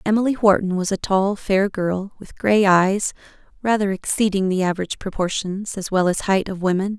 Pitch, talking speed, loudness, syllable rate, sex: 195 Hz, 180 wpm, -20 LUFS, 5.2 syllables/s, female